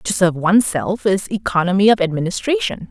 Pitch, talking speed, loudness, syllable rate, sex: 195 Hz, 145 wpm, -17 LUFS, 5.9 syllables/s, female